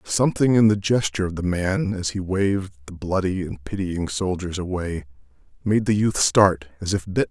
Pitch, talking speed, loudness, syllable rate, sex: 95 Hz, 190 wpm, -22 LUFS, 5.2 syllables/s, male